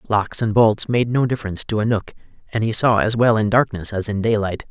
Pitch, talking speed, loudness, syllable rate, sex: 110 Hz, 240 wpm, -19 LUFS, 5.6 syllables/s, male